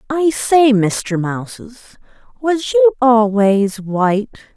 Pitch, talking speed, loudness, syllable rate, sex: 235 Hz, 105 wpm, -15 LUFS, 3.2 syllables/s, female